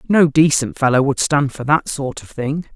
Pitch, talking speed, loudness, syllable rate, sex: 145 Hz, 220 wpm, -17 LUFS, 4.8 syllables/s, female